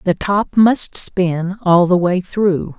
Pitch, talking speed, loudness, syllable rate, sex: 185 Hz, 170 wpm, -15 LUFS, 3.1 syllables/s, female